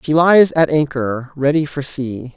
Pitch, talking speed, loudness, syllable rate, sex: 145 Hz, 180 wpm, -16 LUFS, 4.1 syllables/s, male